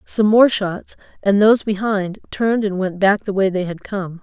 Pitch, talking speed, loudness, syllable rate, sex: 200 Hz, 215 wpm, -18 LUFS, 4.8 syllables/s, female